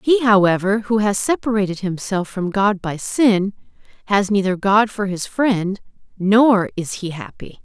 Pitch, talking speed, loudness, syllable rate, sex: 205 Hz, 155 wpm, -18 LUFS, 4.3 syllables/s, female